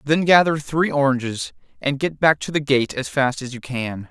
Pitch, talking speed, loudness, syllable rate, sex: 140 Hz, 220 wpm, -20 LUFS, 4.8 syllables/s, male